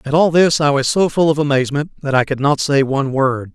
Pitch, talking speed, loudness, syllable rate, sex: 145 Hz, 270 wpm, -16 LUFS, 6.0 syllables/s, male